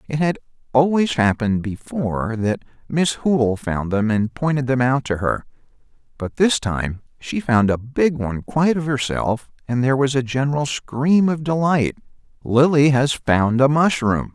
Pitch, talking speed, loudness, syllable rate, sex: 130 Hz, 165 wpm, -19 LUFS, 4.5 syllables/s, male